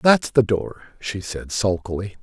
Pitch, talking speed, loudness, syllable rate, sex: 105 Hz, 160 wpm, -22 LUFS, 4.2 syllables/s, male